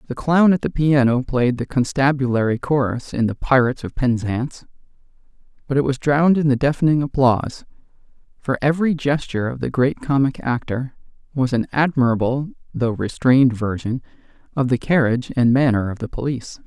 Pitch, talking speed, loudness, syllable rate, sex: 130 Hz, 160 wpm, -19 LUFS, 5.6 syllables/s, male